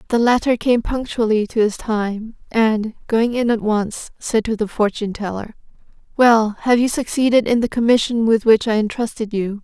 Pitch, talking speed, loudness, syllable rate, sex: 225 Hz, 180 wpm, -18 LUFS, 4.9 syllables/s, female